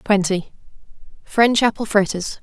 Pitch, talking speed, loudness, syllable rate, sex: 205 Hz, 75 wpm, -18 LUFS, 4.6 syllables/s, female